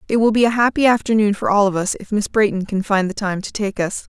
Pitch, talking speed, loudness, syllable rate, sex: 210 Hz, 290 wpm, -18 LUFS, 6.2 syllables/s, female